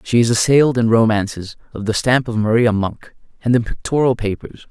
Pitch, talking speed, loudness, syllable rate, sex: 115 Hz, 190 wpm, -17 LUFS, 5.5 syllables/s, male